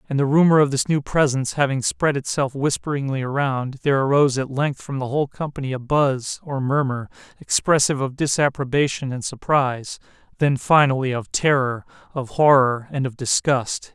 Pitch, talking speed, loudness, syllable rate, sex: 135 Hz, 160 wpm, -20 LUFS, 5.4 syllables/s, male